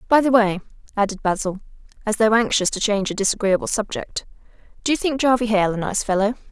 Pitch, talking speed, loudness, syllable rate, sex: 215 Hz, 195 wpm, -20 LUFS, 6.4 syllables/s, female